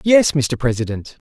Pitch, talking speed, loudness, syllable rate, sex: 140 Hz, 140 wpm, -18 LUFS, 4.5 syllables/s, male